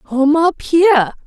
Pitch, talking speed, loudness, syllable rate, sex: 300 Hz, 140 wpm, -13 LUFS, 3.9 syllables/s, female